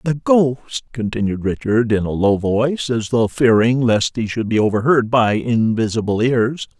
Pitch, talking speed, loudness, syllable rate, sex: 115 Hz, 170 wpm, -17 LUFS, 4.5 syllables/s, male